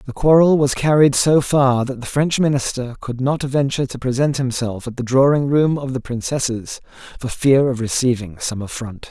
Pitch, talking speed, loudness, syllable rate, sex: 130 Hz, 190 wpm, -18 LUFS, 5.0 syllables/s, male